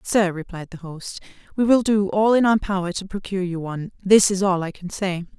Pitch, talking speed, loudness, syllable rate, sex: 190 Hz, 225 wpm, -21 LUFS, 5.5 syllables/s, female